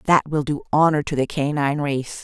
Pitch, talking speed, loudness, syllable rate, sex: 145 Hz, 215 wpm, -21 LUFS, 5.6 syllables/s, female